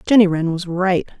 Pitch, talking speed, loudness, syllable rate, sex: 185 Hz, 200 wpm, -17 LUFS, 5.1 syllables/s, female